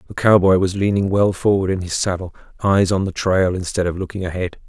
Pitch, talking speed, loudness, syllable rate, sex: 95 Hz, 220 wpm, -18 LUFS, 5.8 syllables/s, male